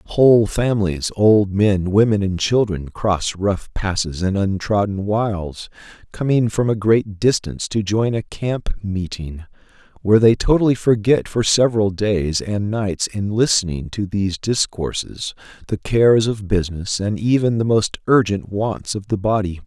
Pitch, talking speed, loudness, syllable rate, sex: 105 Hz, 145 wpm, -19 LUFS, 4.4 syllables/s, male